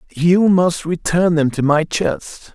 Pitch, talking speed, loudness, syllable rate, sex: 170 Hz, 165 wpm, -16 LUFS, 3.4 syllables/s, male